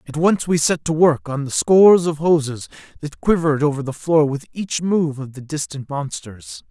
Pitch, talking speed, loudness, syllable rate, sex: 155 Hz, 205 wpm, -18 LUFS, 4.9 syllables/s, male